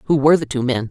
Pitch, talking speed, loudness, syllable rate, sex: 145 Hz, 330 wpm, -17 LUFS, 8.2 syllables/s, female